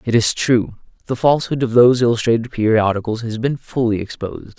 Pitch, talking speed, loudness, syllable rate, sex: 115 Hz, 185 wpm, -17 LUFS, 6.0 syllables/s, male